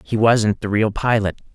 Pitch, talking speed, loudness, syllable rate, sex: 110 Hz, 195 wpm, -18 LUFS, 4.6 syllables/s, male